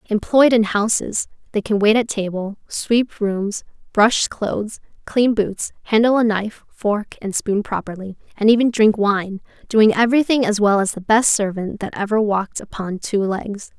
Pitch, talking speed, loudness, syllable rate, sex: 210 Hz, 170 wpm, -18 LUFS, 4.6 syllables/s, female